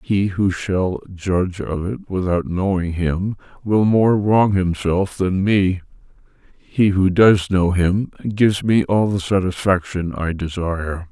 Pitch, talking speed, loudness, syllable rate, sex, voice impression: 95 Hz, 145 wpm, -19 LUFS, 3.7 syllables/s, male, very masculine, very adult-like, very old, very thick, very relaxed, very weak, dark, very soft, very muffled, very halting, raspy, cool, intellectual, very sincere, very calm, very mature, friendly, reassuring, slightly unique, slightly elegant, very wild, very kind, very modest